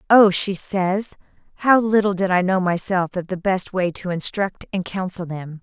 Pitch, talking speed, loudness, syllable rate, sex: 190 Hz, 190 wpm, -20 LUFS, 4.5 syllables/s, female